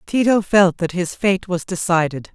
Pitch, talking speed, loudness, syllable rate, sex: 180 Hz, 180 wpm, -18 LUFS, 4.5 syllables/s, female